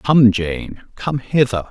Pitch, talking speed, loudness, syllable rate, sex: 115 Hz, 105 wpm, -18 LUFS, 3.2 syllables/s, male